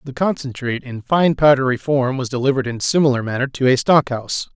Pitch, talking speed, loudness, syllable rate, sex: 135 Hz, 195 wpm, -18 LUFS, 6.2 syllables/s, male